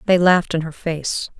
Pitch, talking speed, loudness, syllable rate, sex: 170 Hz, 215 wpm, -19 LUFS, 5.1 syllables/s, female